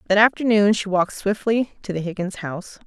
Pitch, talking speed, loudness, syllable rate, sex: 200 Hz, 190 wpm, -21 LUFS, 5.8 syllables/s, female